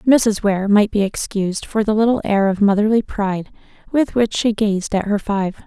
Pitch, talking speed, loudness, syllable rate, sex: 210 Hz, 200 wpm, -18 LUFS, 4.8 syllables/s, female